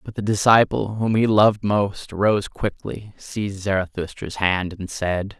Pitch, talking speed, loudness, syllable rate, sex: 100 Hz, 155 wpm, -21 LUFS, 4.6 syllables/s, male